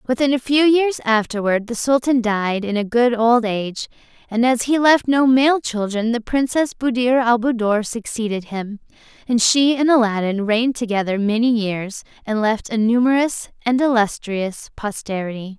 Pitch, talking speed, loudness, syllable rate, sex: 235 Hz, 160 wpm, -18 LUFS, 4.7 syllables/s, female